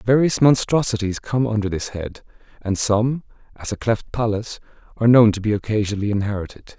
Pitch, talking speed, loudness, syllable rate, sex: 110 Hz, 160 wpm, -20 LUFS, 5.9 syllables/s, male